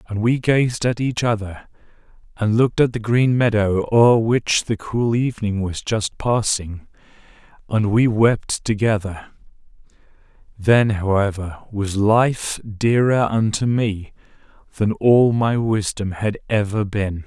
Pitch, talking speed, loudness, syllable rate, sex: 110 Hz, 130 wpm, -19 LUFS, 4.0 syllables/s, male